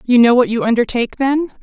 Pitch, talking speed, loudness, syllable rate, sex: 245 Hz, 220 wpm, -15 LUFS, 6.3 syllables/s, female